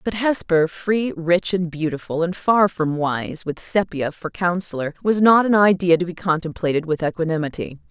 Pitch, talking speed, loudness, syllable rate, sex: 175 Hz, 175 wpm, -20 LUFS, 4.9 syllables/s, female